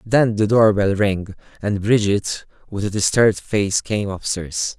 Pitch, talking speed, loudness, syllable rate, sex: 105 Hz, 175 wpm, -19 LUFS, 4.0 syllables/s, male